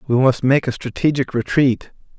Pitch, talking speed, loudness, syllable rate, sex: 130 Hz, 165 wpm, -18 LUFS, 5.0 syllables/s, male